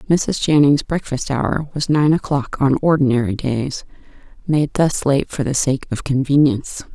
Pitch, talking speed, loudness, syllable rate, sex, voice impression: 140 Hz, 155 wpm, -18 LUFS, 4.6 syllables/s, female, feminine, slightly gender-neutral, very adult-like, slightly old, slightly thin, relaxed, weak, slightly dark, very soft, very muffled, slightly halting, very raspy, slightly cool, intellectual, very sincere, very calm, mature, slightly friendly, slightly reassuring, very unique, very elegant, sweet, very kind, very modest